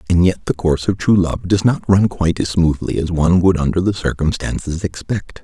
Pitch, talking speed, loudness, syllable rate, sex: 90 Hz, 220 wpm, -17 LUFS, 5.6 syllables/s, male